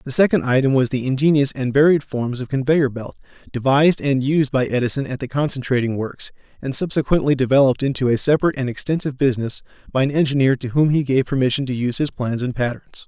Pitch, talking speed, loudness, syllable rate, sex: 135 Hz, 200 wpm, -19 LUFS, 6.6 syllables/s, male